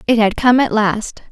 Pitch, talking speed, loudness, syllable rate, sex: 225 Hz, 225 wpm, -15 LUFS, 4.6 syllables/s, female